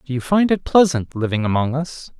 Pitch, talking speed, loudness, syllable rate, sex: 145 Hz, 220 wpm, -18 LUFS, 5.4 syllables/s, male